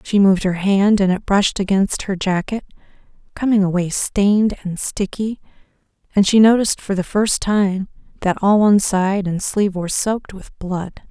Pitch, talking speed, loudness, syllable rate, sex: 195 Hz, 175 wpm, -18 LUFS, 5.0 syllables/s, female